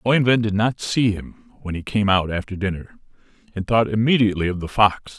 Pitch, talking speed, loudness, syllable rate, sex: 105 Hz, 195 wpm, -20 LUFS, 5.6 syllables/s, male